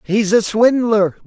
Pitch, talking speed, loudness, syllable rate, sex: 215 Hz, 140 wpm, -15 LUFS, 3.6 syllables/s, male